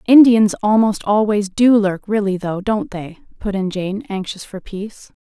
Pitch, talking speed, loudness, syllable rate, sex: 205 Hz, 170 wpm, -17 LUFS, 4.5 syllables/s, female